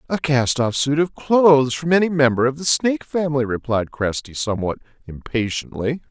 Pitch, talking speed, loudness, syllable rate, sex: 135 Hz, 165 wpm, -19 LUFS, 5.4 syllables/s, male